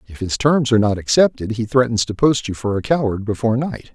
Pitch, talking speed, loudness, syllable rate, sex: 120 Hz, 245 wpm, -18 LUFS, 6.1 syllables/s, male